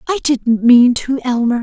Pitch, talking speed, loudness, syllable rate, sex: 250 Hz, 185 wpm, -13 LUFS, 4.4 syllables/s, female